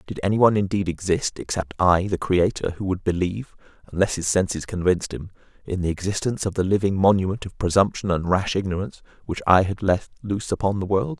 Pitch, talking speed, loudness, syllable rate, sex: 95 Hz, 200 wpm, -22 LUFS, 6.2 syllables/s, male